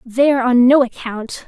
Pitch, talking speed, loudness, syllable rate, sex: 250 Hz, 165 wpm, -14 LUFS, 4.4 syllables/s, female